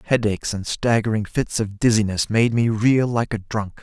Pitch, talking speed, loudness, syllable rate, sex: 110 Hz, 190 wpm, -21 LUFS, 5.0 syllables/s, male